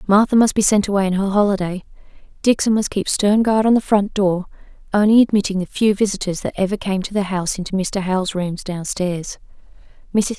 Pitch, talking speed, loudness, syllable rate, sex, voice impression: 200 Hz, 195 wpm, -18 LUFS, 5.8 syllables/s, female, very feminine, slightly adult-like, very thin, slightly tensed, weak, slightly bright, soft, clear, slightly muffled, slightly fluent, halting, very cute, intellectual, slightly refreshing, slightly sincere, very calm, very friendly, reassuring, unique, elegant, slightly wild, very sweet, lively, kind, slightly sharp, very modest